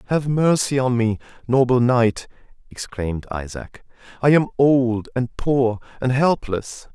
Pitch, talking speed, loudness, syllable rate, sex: 125 Hz, 130 wpm, -20 LUFS, 4.1 syllables/s, male